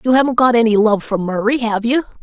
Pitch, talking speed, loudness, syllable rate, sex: 230 Hz, 240 wpm, -15 LUFS, 6.2 syllables/s, male